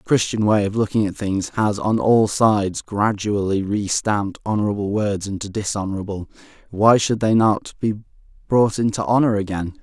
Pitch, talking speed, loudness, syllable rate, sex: 105 Hz, 165 wpm, -20 LUFS, 5.1 syllables/s, male